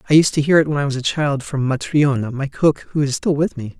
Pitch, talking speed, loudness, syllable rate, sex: 140 Hz, 300 wpm, -18 LUFS, 6.0 syllables/s, male